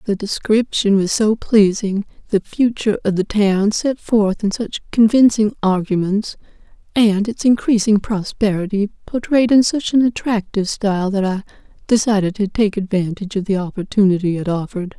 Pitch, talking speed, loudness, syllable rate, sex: 205 Hz, 150 wpm, -17 LUFS, 5.1 syllables/s, female